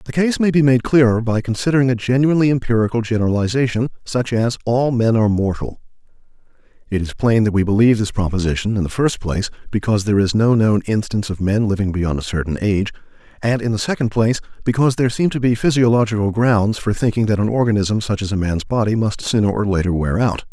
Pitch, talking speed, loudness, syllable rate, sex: 110 Hz, 210 wpm, -18 LUFS, 6.5 syllables/s, male